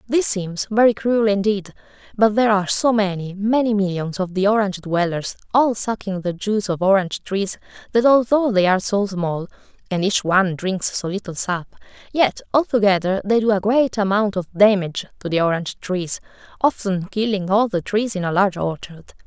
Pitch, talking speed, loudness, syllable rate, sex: 200 Hz, 180 wpm, -20 LUFS, 5.3 syllables/s, female